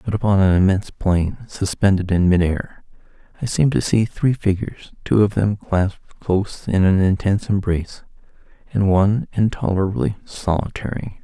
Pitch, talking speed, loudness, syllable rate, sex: 100 Hz, 145 wpm, -19 LUFS, 5.1 syllables/s, male